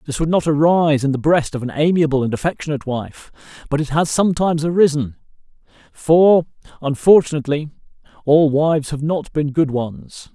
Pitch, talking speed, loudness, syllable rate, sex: 150 Hz, 155 wpm, -17 LUFS, 5.6 syllables/s, male